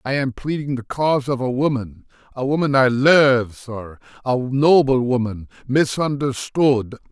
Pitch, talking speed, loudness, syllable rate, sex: 130 Hz, 125 wpm, -19 LUFS, 4.4 syllables/s, male